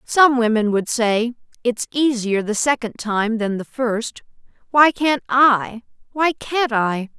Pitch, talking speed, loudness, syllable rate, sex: 240 Hz, 150 wpm, -19 LUFS, 3.6 syllables/s, female